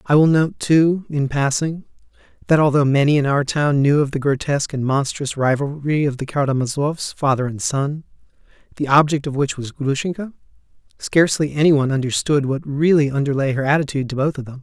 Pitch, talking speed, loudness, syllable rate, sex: 145 Hz, 180 wpm, -19 LUFS, 5.7 syllables/s, male